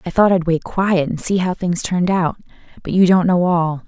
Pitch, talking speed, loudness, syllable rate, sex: 175 Hz, 250 wpm, -17 LUFS, 5.2 syllables/s, female